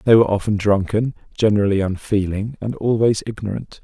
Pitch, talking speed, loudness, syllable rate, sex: 105 Hz, 140 wpm, -19 LUFS, 5.9 syllables/s, male